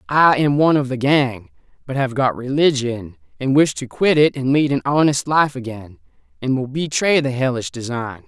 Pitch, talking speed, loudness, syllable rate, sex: 135 Hz, 195 wpm, -18 LUFS, 5.0 syllables/s, male